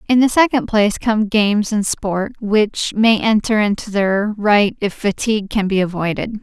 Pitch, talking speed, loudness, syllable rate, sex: 210 Hz, 175 wpm, -16 LUFS, 4.6 syllables/s, female